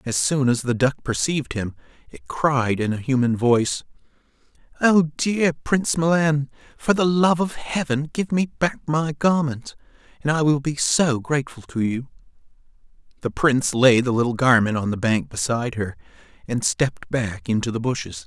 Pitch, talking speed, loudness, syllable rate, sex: 135 Hz, 170 wpm, -21 LUFS, 4.8 syllables/s, male